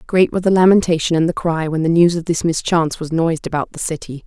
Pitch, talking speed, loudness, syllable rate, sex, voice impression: 165 Hz, 255 wpm, -17 LUFS, 6.5 syllables/s, female, feminine, middle-aged, tensed, powerful, slightly dark, clear, raspy, intellectual, calm, elegant, lively, slightly sharp